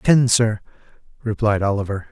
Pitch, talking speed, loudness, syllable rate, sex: 110 Hz, 115 wpm, -19 LUFS, 4.8 syllables/s, male